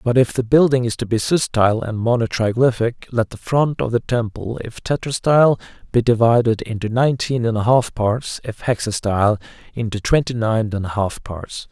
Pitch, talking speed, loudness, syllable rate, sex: 115 Hz, 180 wpm, -19 LUFS, 5.2 syllables/s, male